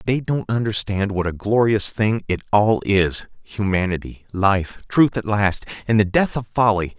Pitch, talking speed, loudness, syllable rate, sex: 105 Hz, 170 wpm, -20 LUFS, 4.4 syllables/s, male